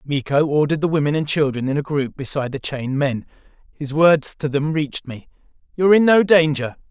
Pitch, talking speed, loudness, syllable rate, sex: 150 Hz, 210 wpm, -19 LUFS, 6.1 syllables/s, male